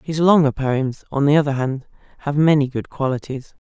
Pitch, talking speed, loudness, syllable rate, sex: 140 Hz, 180 wpm, -19 LUFS, 5.3 syllables/s, female